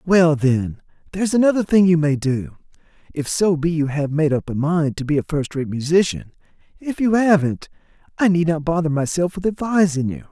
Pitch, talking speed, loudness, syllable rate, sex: 160 Hz, 200 wpm, -19 LUFS, 5.3 syllables/s, male